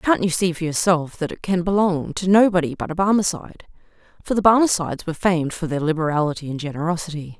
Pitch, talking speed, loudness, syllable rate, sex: 175 Hz, 195 wpm, -20 LUFS, 6.5 syllables/s, female